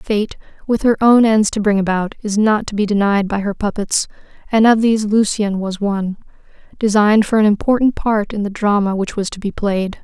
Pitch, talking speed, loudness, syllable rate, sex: 210 Hz, 210 wpm, -16 LUFS, 5.4 syllables/s, female